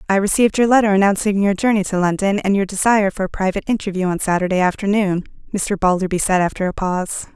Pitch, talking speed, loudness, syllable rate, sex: 195 Hz, 205 wpm, -18 LUFS, 6.8 syllables/s, female